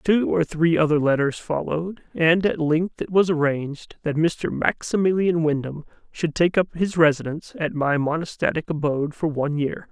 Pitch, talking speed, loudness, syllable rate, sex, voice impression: 160 Hz, 170 wpm, -22 LUFS, 4.9 syllables/s, male, masculine, middle-aged, relaxed, slightly weak, soft, raspy, intellectual, calm, slightly mature, slightly friendly, reassuring, slightly wild, lively, strict